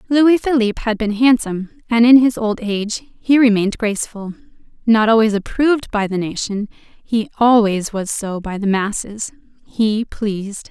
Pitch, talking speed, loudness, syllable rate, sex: 225 Hz, 155 wpm, -17 LUFS, 4.9 syllables/s, female